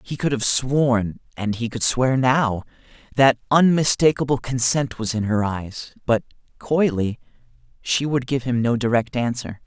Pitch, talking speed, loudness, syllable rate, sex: 125 Hz, 155 wpm, -20 LUFS, 4.3 syllables/s, male